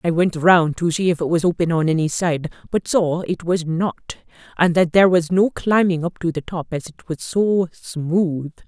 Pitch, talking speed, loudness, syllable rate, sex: 170 Hz, 220 wpm, -19 LUFS, 4.7 syllables/s, female